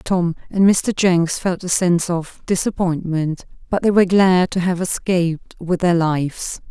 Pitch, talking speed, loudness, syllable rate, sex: 175 Hz, 170 wpm, -18 LUFS, 4.4 syllables/s, female